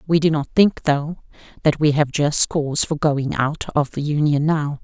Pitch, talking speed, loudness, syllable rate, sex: 150 Hz, 210 wpm, -19 LUFS, 4.5 syllables/s, female